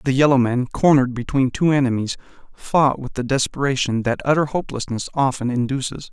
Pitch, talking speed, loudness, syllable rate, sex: 130 Hz, 155 wpm, -20 LUFS, 5.7 syllables/s, male